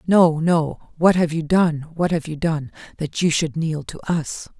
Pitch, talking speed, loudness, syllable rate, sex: 160 Hz, 210 wpm, -21 LUFS, 4.2 syllables/s, female